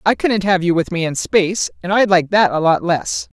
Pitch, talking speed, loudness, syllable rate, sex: 185 Hz, 265 wpm, -16 LUFS, 5.2 syllables/s, female